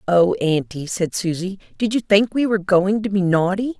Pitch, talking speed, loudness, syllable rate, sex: 195 Hz, 205 wpm, -19 LUFS, 5.0 syllables/s, female